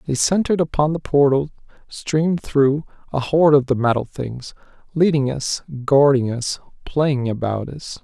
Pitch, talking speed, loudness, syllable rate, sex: 140 Hz, 140 wpm, -19 LUFS, 4.7 syllables/s, male